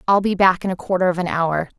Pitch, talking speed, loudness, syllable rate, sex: 180 Hz, 305 wpm, -19 LUFS, 6.4 syllables/s, female